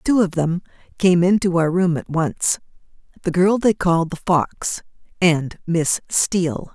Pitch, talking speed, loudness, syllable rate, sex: 175 Hz, 150 wpm, -19 LUFS, 3.9 syllables/s, female